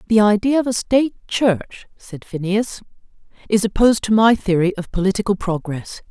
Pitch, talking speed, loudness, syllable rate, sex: 210 Hz, 155 wpm, -18 LUFS, 5.2 syllables/s, female